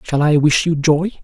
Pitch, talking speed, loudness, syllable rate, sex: 155 Hz, 245 wpm, -15 LUFS, 4.8 syllables/s, male